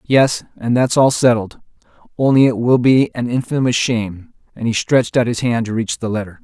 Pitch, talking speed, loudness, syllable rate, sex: 120 Hz, 205 wpm, -16 LUFS, 5.3 syllables/s, male